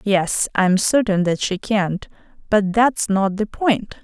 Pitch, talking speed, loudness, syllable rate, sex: 205 Hz, 180 wpm, -19 LUFS, 3.8 syllables/s, female